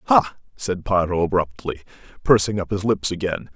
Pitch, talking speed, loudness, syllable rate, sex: 95 Hz, 150 wpm, -21 LUFS, 5.3 syllables/s, male